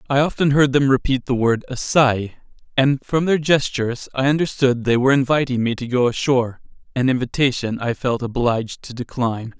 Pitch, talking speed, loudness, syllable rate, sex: 130 Hz, 175 wpm, -19 LUFS, 5.5 syllables/s, male